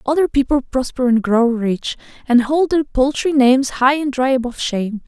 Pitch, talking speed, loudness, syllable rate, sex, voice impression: 260 Hz, 190 wpm, -17 LUFS, 5.2 syllables/s, female, feminine, slightly young, slightly tensed, slightly soft, slightly calm, slightly friendly